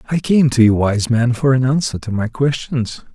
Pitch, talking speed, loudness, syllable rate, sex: 125 Hz, 230 wpm, -16 LUFS, 4.9 syllables/s, male